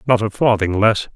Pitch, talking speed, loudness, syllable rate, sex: 110 Hz, 210 wpm, -16 LUFS, 5.2 syllables/s, male